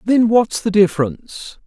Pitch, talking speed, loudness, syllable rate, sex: 200 Hz, 145 wpm, -16 LUFS, 4.6 syllables/s, male